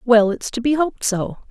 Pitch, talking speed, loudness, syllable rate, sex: 235 Hz, 240 wpm, -19 LUFS, 5.4 syllables/s, female